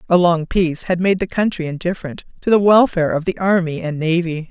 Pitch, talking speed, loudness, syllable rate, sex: 175 Hz, 215 wpm, -17 LUFS, 6.0 syllables/s, female